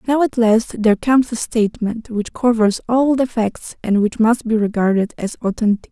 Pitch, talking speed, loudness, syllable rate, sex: 225 Hz, 195 wpm, -17 LUFS, 5.0 syllables/s, female